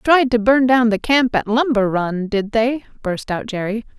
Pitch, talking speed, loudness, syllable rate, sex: 230 Hz, 210 wpm, -18 LUFS, 4.4 syllables/s, female